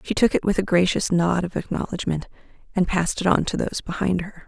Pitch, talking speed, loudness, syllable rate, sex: 180 Hz, 230 wpm, -23 LUFS, 6.2 syllables/s, female